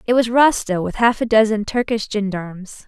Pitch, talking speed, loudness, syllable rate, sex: 215 Hz, 190 wpm, -18 LUFS, 5.1 syllables/s, female